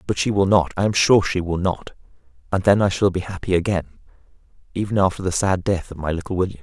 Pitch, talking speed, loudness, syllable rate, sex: 90 Hz, 235 wpm, -20 LUFS, 6.4 syllables/s, male